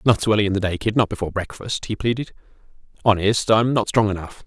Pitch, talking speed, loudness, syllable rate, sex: 105 Hz, 230 wpm, -21 LUFS, 6.6 syllables/s, male